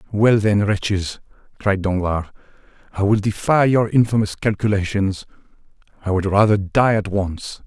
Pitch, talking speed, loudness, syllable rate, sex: 100 Hz, 125 wpm, -19 LUFS, 4.7 syllables/s, male